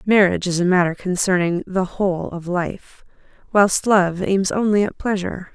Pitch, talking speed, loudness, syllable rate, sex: 185 Hz, 160 wpm, -19 LUFS, 4.9 syllables/s, female